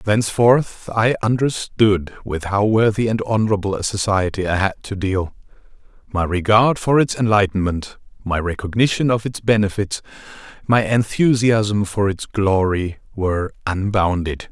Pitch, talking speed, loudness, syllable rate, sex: 105 Hz, 130 wpm, -19 LUFS, 4.6 syllables/s, male